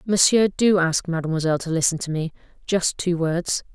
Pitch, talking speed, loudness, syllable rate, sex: 175 Hz, 160 wpm, -21 LUFS, 5.3 syllables/s, female